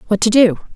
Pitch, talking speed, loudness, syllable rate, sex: 215 Hz, 235 wpm, -14 LUFS, 7.0 syllables/s, female